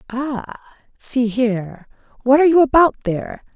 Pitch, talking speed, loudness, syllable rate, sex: 255 Hz, 135 wpm, -17 LUFS, 5.0 syllables/s, female